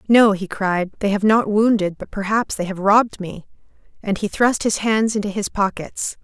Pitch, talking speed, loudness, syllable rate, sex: 205 Hz, 200 wpm, -19 LUFS, 4.8 syllables/s, female